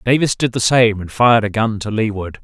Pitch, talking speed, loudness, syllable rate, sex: 110 Hz, 245 wpm, -16 LUFS, 5.6 syllables/s, male